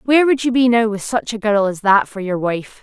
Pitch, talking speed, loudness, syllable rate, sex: 225 Hz, 300 wpm, -17 LUFS, 5.5 syllables/s, female